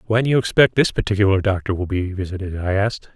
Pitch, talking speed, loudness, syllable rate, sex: 100 Hz, 230 wpm, -19 LUFS, 6.7 syllables/s, male